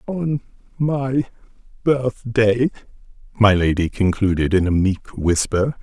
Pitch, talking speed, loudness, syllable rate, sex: 110 Hz, 105 wpm, -19 LUFS, 3.7 syllables/s, male